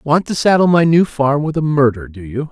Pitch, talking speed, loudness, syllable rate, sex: 145 Hz, 265 wpm, -14 LUFS, 5.3 syllables/s, male